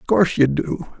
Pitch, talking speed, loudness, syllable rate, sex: 125 Hz, 240 wpm, -19 LUFS, 5.3 syllables/s, male